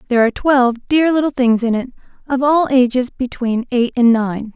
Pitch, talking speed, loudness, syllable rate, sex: 250 Hz, 200 wpm, -16 LUFS, 5.4 syllables/s, female